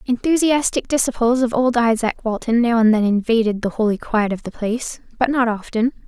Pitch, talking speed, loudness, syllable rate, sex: 235 Hz, 190 wpm, -18 LUFS, 5.5 syllables/s, female